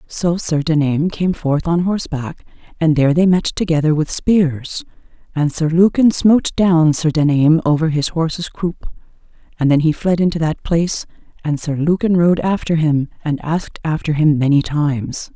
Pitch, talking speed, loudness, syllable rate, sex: 160 Hz, 170 wpm, -16 LUFS, 5.0 syllables/s, female